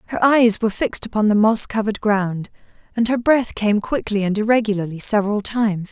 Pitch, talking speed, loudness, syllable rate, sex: 215 Hz, 185 wpm, -18 LUFS, 6.0 syllables/s, female